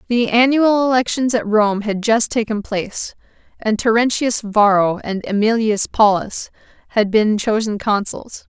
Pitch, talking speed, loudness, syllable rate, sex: 220 Hz, 135 wpm, -17 LUFS, 4.3 syllables/s, female